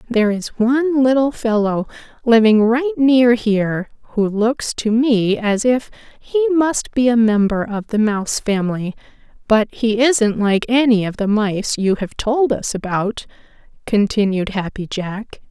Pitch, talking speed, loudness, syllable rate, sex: 225 Hz, 155 wpm, -17 LUFS, 4.2 syllables/s, female